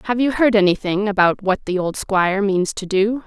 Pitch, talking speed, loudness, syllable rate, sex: 200 Hz, 220 wpm, -18 LUFS, 5.2 syllables/s, female